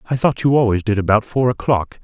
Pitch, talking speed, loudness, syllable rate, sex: 115 Hz, 235 wpm, -17 LUFS, 6.1 syllables/s, male